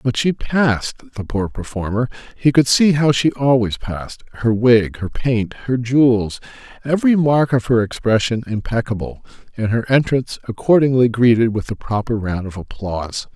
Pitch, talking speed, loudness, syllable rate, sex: 120 Hz, 155 wpm, -18 LUFS, 4.9 syllables/s, male